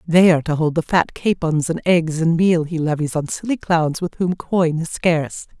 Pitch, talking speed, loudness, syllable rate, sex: 165 Hz, 225 wpm, -19 LUFS, 4.9 syllables/s, female